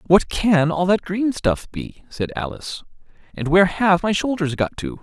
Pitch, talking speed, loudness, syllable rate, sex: 170 Hz, 190 wpm, -20 LUFS, 4.7 syllables/s, male